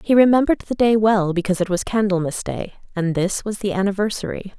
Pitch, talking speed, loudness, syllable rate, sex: 200 Hz, 195 wpm, -20 LUFS, 6.1 syllables/s, female